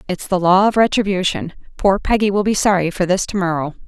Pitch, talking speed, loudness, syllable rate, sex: 190 Hz, 200 wpm, -17 LUFS, 5.9 syllables/s, female